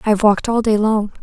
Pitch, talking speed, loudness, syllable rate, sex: 215 Hz, 295 wpm, -16 LUFS, 6.8 syllables/s, female